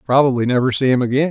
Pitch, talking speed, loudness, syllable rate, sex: 130 Hz, 230 wpm, -16 LUFS, 7.3 syllables/s, male